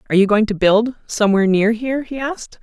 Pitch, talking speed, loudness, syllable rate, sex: 220 Hz, 230 wpm, -17 LUFS, 6.8 syllables/s, female